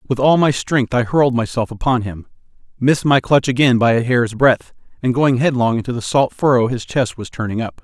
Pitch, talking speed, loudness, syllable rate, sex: 125 Hz, 220 wpm, -16 LUFS, 5.4 syllables/s, male